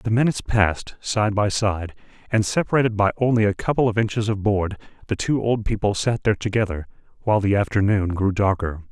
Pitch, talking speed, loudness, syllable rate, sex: 105 Hz, 190 wpm, -21 LUFS, 5.8 syllables/s, male